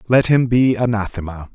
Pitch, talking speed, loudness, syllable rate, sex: 115 Hz, 155 wpm, -16 LUFS, 5.1 syllables/s, male